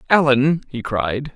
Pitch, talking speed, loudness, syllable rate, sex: 135 Hz, 135 wpm, -19 LUFS, 3.7 syllables/s, male